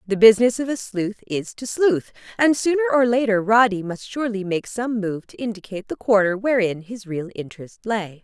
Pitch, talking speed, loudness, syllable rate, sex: 215 Hz, 195 wpm, -21 LUFS, 5.5 syllables/s, female